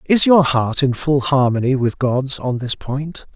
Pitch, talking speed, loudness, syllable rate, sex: 135 Hz, 195 wpm, -17 LUFS, 4.1 syllables/s, male